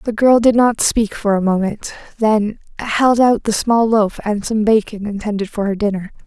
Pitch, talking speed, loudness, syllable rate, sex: 215 Hz, 200 wpm, -16 LUFS, 4.7 syllables/s, female